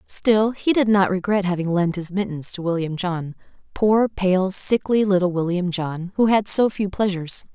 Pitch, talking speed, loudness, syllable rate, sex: 190 Hz, 175 wpm, -20 LUFS, 4.8 syllables/s, female